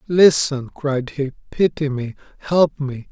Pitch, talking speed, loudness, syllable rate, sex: 145 Hz, 115 wpm, -19 LUFS, 3.7 syllables/s, male